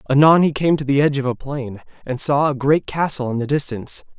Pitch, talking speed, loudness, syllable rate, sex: 140 Hz, 245 wpm, -18 LUFS, 6.1 syllables/s, male